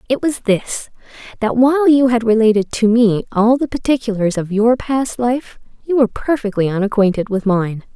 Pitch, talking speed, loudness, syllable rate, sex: 235 Hz, 165 wpm, -16 LUFS, 5.1 syllables/s, female